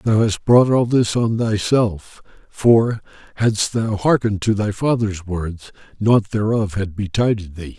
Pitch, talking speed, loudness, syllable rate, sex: 105 Hz, 155 wpm, -18 LUFS, 4.0 syllables/s, male